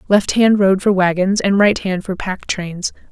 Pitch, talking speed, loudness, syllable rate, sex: 195 Hz, 190 wpm, -16 LUFS, 4.3 syllables/s, female